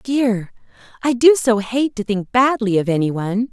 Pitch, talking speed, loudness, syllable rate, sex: 225 Hz, 155 wpm, -17 LUFS, 4.5 syllables/s, female